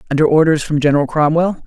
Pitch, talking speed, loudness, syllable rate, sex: 155 Hz, 180 wpm, -14 LUFS, 7.0 syllables/s, male